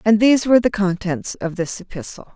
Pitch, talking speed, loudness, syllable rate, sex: 200 Hz, 205 wpm, -18 LUFS, 6.0 syllables/s, female